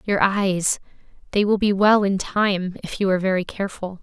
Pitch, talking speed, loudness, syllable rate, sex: 195 Hz, 180 wpm, -21 LUFS, 5.1 syllables/s, female